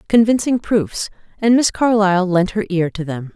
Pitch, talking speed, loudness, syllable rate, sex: 200 Hz, 180 wpm, -17 LUFS, 4.9 syllables/s, female